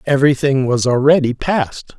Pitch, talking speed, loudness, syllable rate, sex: 135 Hz, 120 wpm, -15 LUFS, 4.9 syllables/s, male